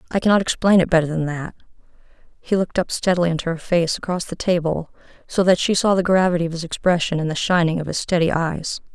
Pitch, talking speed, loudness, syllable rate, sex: 175 Hz, 220 wpm, -20 LUFS, 6.4 syllables/s, female